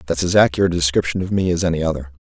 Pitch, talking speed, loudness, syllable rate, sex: 85 Hz, 270 wpm, -18 LUFS, 8.7 syllables/s, male